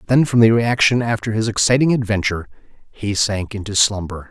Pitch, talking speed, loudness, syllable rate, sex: 110 Hz, 165 wpm, -17 LUFS, 5.7 syllables/s, male